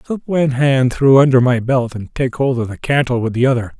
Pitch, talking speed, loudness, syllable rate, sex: 130 Hz, 255 wpm, -15 LUFS, 5.5 syllables/s, male